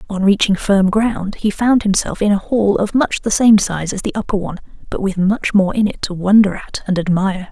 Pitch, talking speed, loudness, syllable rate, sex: 200 Hz, 240 wpm, -16 LUFS, 5.3 syllables/s, female